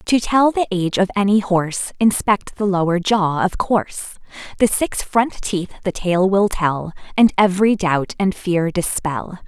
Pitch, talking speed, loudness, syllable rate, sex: 195 Hz, 170 wpm, -18 LUFS, 4.4 syllables/s, female